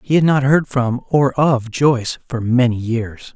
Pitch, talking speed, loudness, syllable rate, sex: 130 Hz, 195 wpm, -17 LUFS, 4.1 syllables/s, male